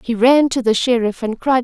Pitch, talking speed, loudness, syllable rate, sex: 240 Hz, 260 wpm, -16 LUFS, 5.1 syllables/s, female